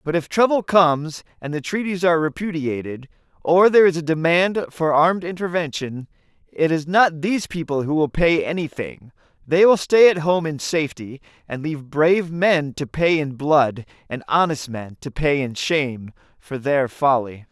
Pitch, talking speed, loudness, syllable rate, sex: 155 Hz, 175 wpm, -19 LUFS, 4.9 syllables/s, male